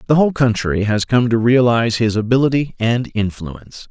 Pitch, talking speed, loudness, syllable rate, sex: 120 Hz, 170 wpm, -16 LUFS, 5.4 syllables/s, male